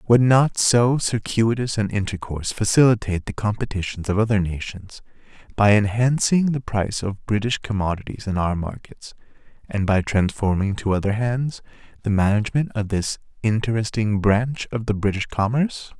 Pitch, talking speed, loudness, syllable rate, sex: 105 Hz, 145 wpm, -21 LUFS, 5.1 syllables/s, male